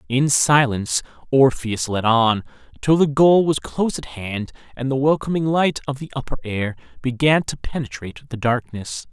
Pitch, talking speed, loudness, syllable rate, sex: 130 Hz, 165 wpm, -20 LUFS, 4.9 syllables/s, male